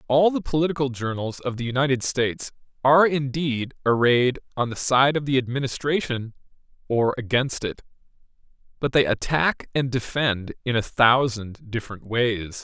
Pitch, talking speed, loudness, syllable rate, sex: 130 Hz, 140 wpm, -23 LUFS, 4.9 syllables/s, male